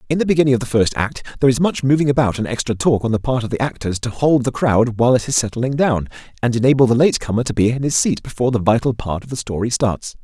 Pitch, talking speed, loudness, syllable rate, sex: 120 Hz, 280 wpm, -17 LUFS, 6.8 syllables/s, male